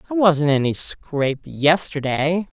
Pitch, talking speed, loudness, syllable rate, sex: 155 Hz, 140 wpm, -20 LUFS, 4.4 syllables/s, female